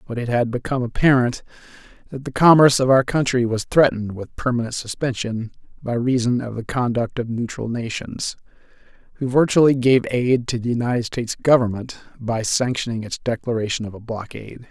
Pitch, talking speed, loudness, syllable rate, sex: 120 Hz, 165 wpm, -20 LUFS, 5.7 syllables/s, male